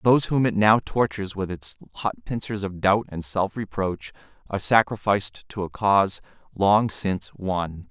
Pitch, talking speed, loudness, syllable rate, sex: 100 Hz, 165 wpm, -24 LUFS, 4.9 syllables/s, male